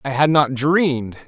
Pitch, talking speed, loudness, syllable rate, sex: 140 Hz, 190 wpm, -17 LUFS, 4.3 syllables/s, male